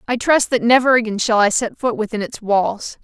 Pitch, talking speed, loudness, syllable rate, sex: 230 Hz, 235 wpm, -17 LUFS, 5.3 syllables/s, female